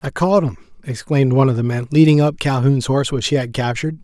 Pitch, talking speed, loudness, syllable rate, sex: 135 Hz, 240 wpm, -17 LUFS, 6.7 syllables/s, male